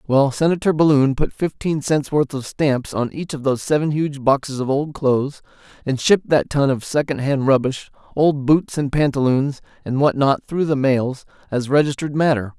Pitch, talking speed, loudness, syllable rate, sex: 140 Hz, 185 wpm, -19 LUFS, 5.1 syllables/s, male